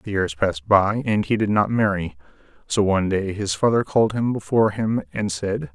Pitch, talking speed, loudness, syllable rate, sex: 100 Hz, 210 wpm, -21 LUFS, 5.3 syllables/s, male